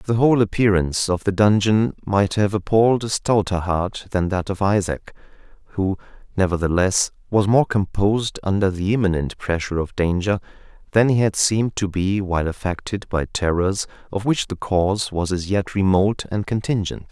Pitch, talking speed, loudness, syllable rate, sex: 100 Hz, 165 wpm, -20 LUFS, 5.2 syllables/s, male